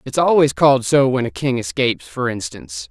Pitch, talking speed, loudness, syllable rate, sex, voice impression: 135 Hz, 185 wpm, -17 LUFS, 5.4 syllables/s, male, masculine, adult-like, tensed, clear, fluent, slightly nasal, cool, intellectual, sincere, friendly, reassuring, wild, lively, slightly kind